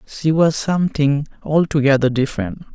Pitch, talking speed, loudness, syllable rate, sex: 145 Hz, 110 wpm, -18 LUFS, 5.0 syllables/s, male